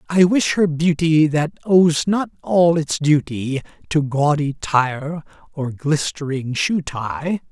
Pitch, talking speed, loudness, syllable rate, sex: 155 Hz, 135 wpm, -19 LUFS, 3.2 syllables/s, male